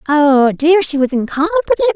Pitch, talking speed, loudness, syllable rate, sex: 315 Hz, 155 wpm, -13 LUFS, 5.1 syllables/s, female